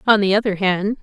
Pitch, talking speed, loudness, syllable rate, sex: 200 Hz, 235 wpm, -17 LUFS, 5.8 syllables/s, female